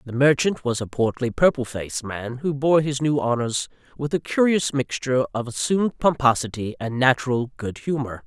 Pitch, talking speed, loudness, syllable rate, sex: 135 Hz, 175 wpm, -22 LUFS, 5.2 syllables/s, male